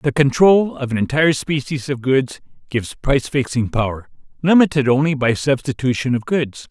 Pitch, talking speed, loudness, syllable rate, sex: 135 Hz, 160 wpm, -18 LUFS, 5.3 syllables/s, male